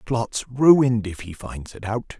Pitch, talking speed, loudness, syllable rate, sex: 115 Hz, 190 wpm, -20 LUFS, 3.8 syllables/s, male